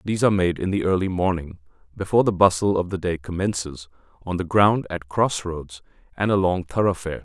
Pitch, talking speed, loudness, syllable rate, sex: 90 Hz, 190 wpm, -22 LUFS, 5.9 syllables/s, male